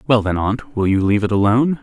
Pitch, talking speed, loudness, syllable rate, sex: 110 Hz, 265 wpm, -17 LUFS, 6.6 syllables/s, male